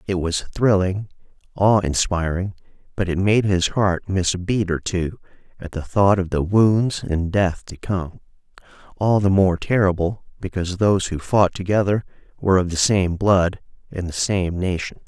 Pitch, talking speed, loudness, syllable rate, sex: 95 Hz, 170 wpm, -20 LUFS, 4.6 syllables/s, male